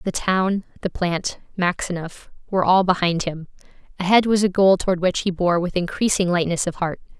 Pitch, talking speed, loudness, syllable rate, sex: 180 Hz, 185 wpm, -21 LUFS, 5.2 syllables/s, female